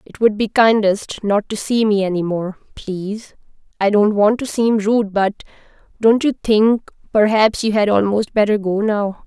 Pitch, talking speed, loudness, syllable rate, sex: 210 Hz, 170 wpm, -17 LUFS, 4.5 syllables/s, female